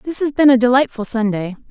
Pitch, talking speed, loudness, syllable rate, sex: 245 Hz, 210 wpm, -16 LUFS, 6.1 syllables/s, female